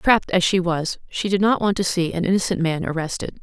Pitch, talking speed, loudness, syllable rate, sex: 180 Hz, 245 wpm, -21 LUFS, 5.9 syllables/s, female